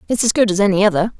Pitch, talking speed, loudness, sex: 205 Hz, 350 wpm, -15 LUFS, female